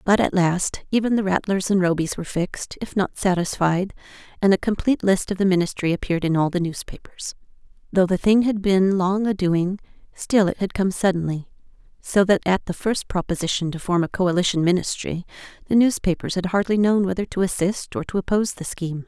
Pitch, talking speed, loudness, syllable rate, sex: 190 Hz, 190 wpm, -21 LUFS, 5.8 syllables/s, female